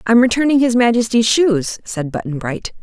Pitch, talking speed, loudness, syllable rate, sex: 225 Hz, 170 wpm, -16 LUFS, 5.0 syllables/s, female